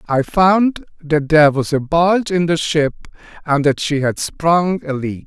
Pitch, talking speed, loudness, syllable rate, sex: 155 Hz, 195 wpm, -16 LUFS, 4.3 syllables/s, male